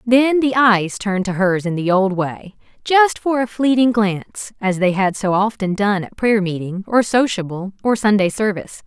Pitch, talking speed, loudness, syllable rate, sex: 210 Hz, 195 wpm, -17 LUFS, 4.7 syllables/s, female